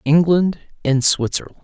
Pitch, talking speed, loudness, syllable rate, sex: 155 Hz, 110 wpm, -17 LUFS, 4.9 syllables/s, male